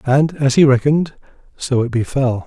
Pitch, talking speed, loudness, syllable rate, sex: 135 Hz, 170 wpm, -16 LUFS, 5.1 syllables/s, male